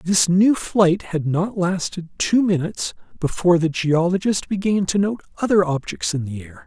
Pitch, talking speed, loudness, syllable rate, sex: 175 Hz, 170 wpm, -20 LUFS, 4.7 syllables/s, male